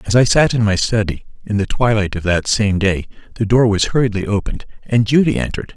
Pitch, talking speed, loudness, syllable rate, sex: 105 Hz, 220 wpm, -16 LUFS, 6.0 syllables/s, male